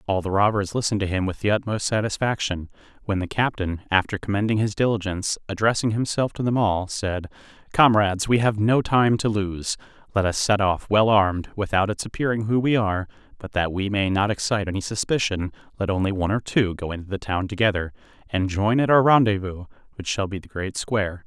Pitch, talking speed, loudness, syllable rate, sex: 100 Hz, 200 wpm, -23 LUFS, 5.9 syllables/s, male